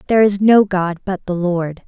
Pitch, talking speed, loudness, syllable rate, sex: 190 Hz, 225 wpm, -16 LUFS, 5.0 syllables/s, female